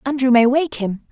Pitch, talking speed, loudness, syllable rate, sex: 255 Hz, 215 wpm, -17 LUFS, 5.1 syllables/s, female